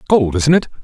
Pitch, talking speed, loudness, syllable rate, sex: 135 Hz, 215 wpm, -14 LUFS, 5.8 syllables/s, male